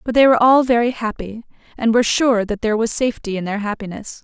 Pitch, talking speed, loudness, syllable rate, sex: 225 Hz, 225 wpm, -17 LUFS, 6.6 syllables/s, female